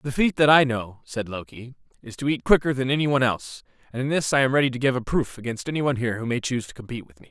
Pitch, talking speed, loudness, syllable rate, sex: 130 Hz, 295 wpm, -23 LUFS, 7.4 syllables/s, male